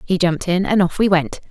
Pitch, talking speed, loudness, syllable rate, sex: 180 Hz, 280 wpm, -17 LUFS, 6.1 syllables/s, female